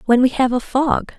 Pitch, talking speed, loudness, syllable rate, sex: 255 Hz, 250 wpm, -17 LUFS, 5.0 syllables/s, female